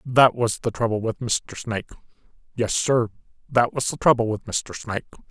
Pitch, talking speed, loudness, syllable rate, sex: 115 Hz, 180 wpm, -23 LUFS, 5.1 syllables/s, male